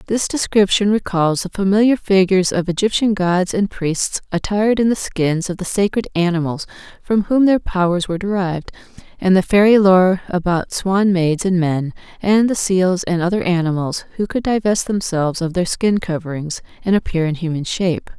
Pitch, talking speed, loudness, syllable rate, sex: 185 Hz, 175 wpm, -17 LUFS, 5.2 syllables/s, female